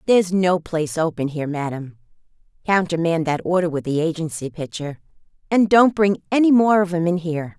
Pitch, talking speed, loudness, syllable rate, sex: 170 Hz, 175 wpm, -20 LUFS, 5.7 syllables/s, female